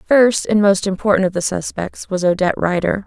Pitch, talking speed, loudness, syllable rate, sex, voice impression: 190 Hz, 195 wpm, -17 LUFS, 5.3 syllables/s, female, very feminine, young, thin, tensed, slightly powerful, slightly bright, soft, slightly clear, fluent, raspy, cute, very intellectual, refreshing, sincere, calm, friendly, reassuring, unique, slightly elegant, wild, slightly sweet, lively, slightly kind, slightly intense, light